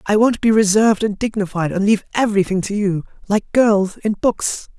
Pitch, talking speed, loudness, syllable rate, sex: 205 Hz, 190 wpm, -17 LUFS, 5.5 syllables/s, male